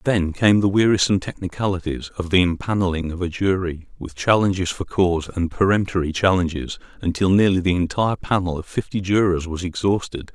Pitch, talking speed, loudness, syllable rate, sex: 90 Hz, 160 wpm, -20 LUFS, 5.7 syllables/s, male